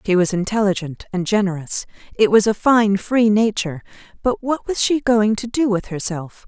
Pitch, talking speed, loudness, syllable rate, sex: 210 Hz, 185 wpm, -19 LUFS, 5.0 syllables/s, female